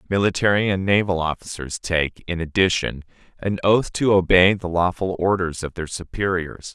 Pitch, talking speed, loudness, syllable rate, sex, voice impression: 90 Hz, 150 wpm, -21 LUFS, 4.9 syllables/s, male, masculine, adult-like, tensed, slightly powerful, clear, fluent, cool, intellectual, calm, slightly mature, wild, slightly lively, slightly modest